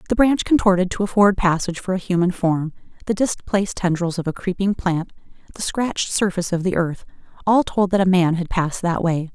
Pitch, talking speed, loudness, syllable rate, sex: 185 Hz, 195 wpm, -20 LUFS, 5.8 syllables/s, female